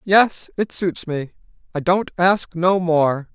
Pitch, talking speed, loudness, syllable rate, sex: 175 Hz, 160 wpm, -19 LUFS, 3.3 syllables/s, male